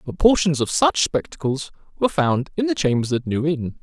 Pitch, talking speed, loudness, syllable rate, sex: 155 Hz, 205 wpm, -21 LUFS, 5.3 syllables/s, male